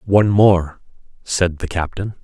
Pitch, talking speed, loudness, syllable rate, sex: 95 Hz, 135 wpm, -17 LUFS, 4.2 syllables/s, male